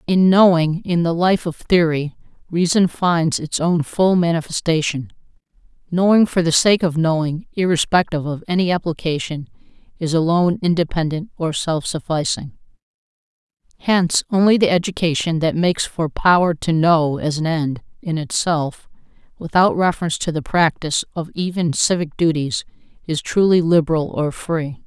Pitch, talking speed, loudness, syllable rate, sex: 165 Hz, 140 wpm, -18 LUFS, 5.0 syllables/s, female